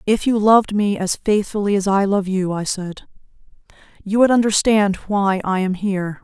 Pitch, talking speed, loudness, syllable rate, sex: 200 Hz, 185 wpm, -18 LUFS, 4.9 syllables/s, female